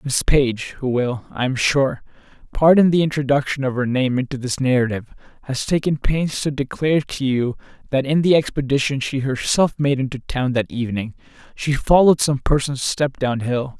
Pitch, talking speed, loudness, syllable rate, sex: 135 Hz, 180 wpm, -19 LUFS, 5.2 syllables/s, male